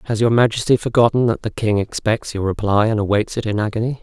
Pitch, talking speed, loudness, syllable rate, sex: 110 Hz, 225 wpm, -18 LUFS, 6.2 syllables/s, male